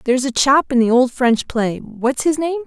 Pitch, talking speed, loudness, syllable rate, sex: 260 Hz, 225 wpm, -17 LUFS, 4.8 syllables/s, female